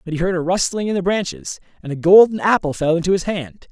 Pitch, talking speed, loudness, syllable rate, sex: 175 Hz, 260 wpm, -17 LUFS, 6.2 syllables/s, male